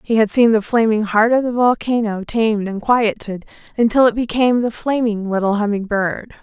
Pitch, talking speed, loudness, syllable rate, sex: 220 Hz, 185 wpm, -17 LUFS, 5.3 syllables/s, female